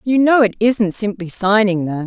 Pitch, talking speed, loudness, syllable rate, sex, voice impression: 210 Hz, 205 wpm, -16 LUFS, 4.6 syllables/s, female, feminine, middle-aged, powerful, clear, slightly halting, calm, slightly friendly, slightly elegant, lively, strict, intense, slightly sharp